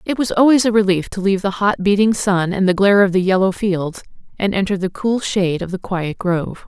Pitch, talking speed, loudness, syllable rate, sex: 195 Hz, 245 wpm, -17 LUFS, 5.8 syllables/s, female